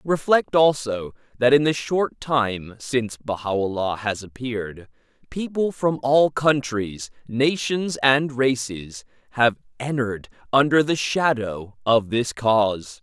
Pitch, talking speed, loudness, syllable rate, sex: 125 Hz, 120 wpm, -22 LUFS, 3.8 syllables/s, male